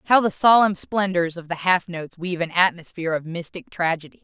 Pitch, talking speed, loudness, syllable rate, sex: 175 Hz, 200 wpm, -21 LUFS, 5.9 syllables/s, female